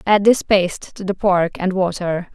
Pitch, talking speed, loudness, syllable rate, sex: 190 Hz, 205 wpm, -18 LUFS, 4.5 syllables/s, female